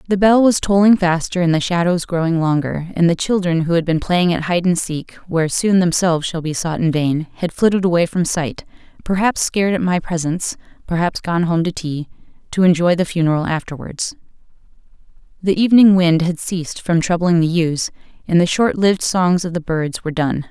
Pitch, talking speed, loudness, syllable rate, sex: 175 Hz, 195 wpm, -17 LUFS, 5.5 syllables/s, female